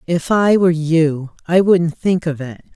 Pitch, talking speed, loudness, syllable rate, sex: 165 Hz, 195 wpm, -16 LUFS, 4.2 syllables/s, female